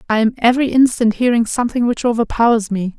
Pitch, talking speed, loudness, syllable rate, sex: 235 Hz, 180 wpm, -15 LUFS, 6.6 syllables/s, female